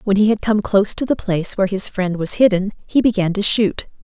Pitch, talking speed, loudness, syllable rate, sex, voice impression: 200 Hz, 250 wpm, -17 LUFS, 5.8 syllables/s, female, very feminine, middle-aged, thin, tensed, slightly powerful, dark, hard, very clear, fluent, slightly raspy, cool, very intellectual, refreshing, very sincere, very calm, slightly friendly, very reassuring, slightly unique, very elegant, slightly wild, slightly sweet, kind, slightly intense, slightly modest